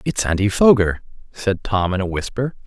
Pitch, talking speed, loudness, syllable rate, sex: 105 Hz, 180 wpm, -19 LUFS, 5.0 syllables/s, male